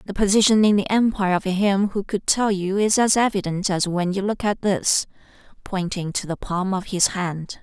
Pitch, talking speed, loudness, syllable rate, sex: 195 Hz, 205 wpm, -21 LUFS, 4.9 syllables/s, female